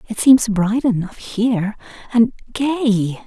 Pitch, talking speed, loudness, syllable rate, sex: 220 Hz, 130 wpm, -18 LUFS, 4.7 syllables/s, female